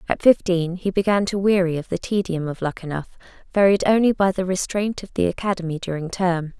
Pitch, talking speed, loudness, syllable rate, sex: 185 Hz, 190 wpm, -21 LUFS, 5.6 syllables/s, female